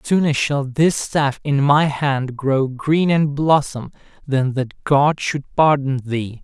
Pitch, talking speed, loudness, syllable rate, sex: 140 Hz, 160 wpm, -18 LUFS, 3.4 syllables/s, male